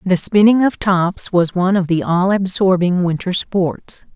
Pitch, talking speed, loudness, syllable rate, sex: 185 Hz, 175 wpm, -16 LUFS, 4.3 syllables/s, female